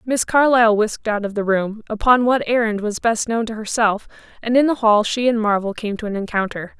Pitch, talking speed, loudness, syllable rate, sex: 220 Hz, 230 wpm, -18 LUFS, 5.6 syllables/s, female